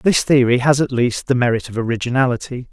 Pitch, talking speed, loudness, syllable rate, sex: 125 Hz, 200 wpm, -17 LUFS, 6.0 syllables/s, male